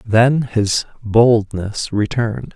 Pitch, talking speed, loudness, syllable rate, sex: 110 Hz, 95 wpm, -17 LUFS, 3.1 syllables/s, male